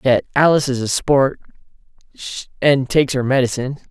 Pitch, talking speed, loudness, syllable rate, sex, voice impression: 130 Hz, 140 wpm, -17 LUFS, 6.3 syllables/s, male, masculine, adult-like, slightly muffled, slightly refreshing, unique